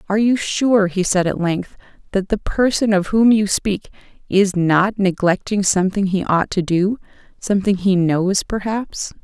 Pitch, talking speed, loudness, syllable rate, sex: 195 Hz, 160 wpm, -18 LUFS, 4.5 syllables/s, female